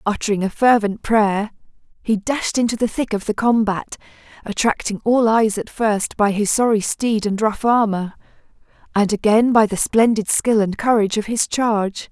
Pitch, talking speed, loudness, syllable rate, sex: 215 Hz, 175 wpm, -18 LUFS, 4.8 syllables/s, female